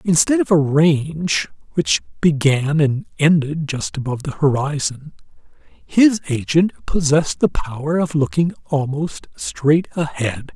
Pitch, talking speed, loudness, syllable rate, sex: 150 Hz, 125 wpm, -18 LUFS, 4.1 syllables/s, male